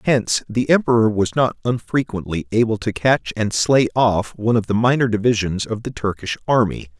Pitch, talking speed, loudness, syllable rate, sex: 110 Hz, 180 wpm, -19 LUFS, 5.3 syllables/s, male